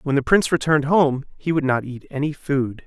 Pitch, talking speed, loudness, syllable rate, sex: 145 Hz, 230 wpm, -20 LUFS, 5.7 syllables/s, male